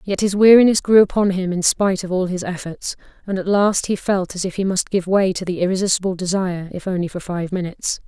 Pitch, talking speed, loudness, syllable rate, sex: 185 Hz, 240 wpm, -18 LUFS, 6.0 syllables/s, female